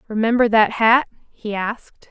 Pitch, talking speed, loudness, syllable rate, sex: 225 Hz, 140 wpm, -18 LUFS, 4.5 syllables/s, female